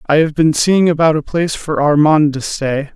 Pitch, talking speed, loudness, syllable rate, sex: 155 Hz, 225 wpm, -14 LUFS, 5.2 syllables/s, male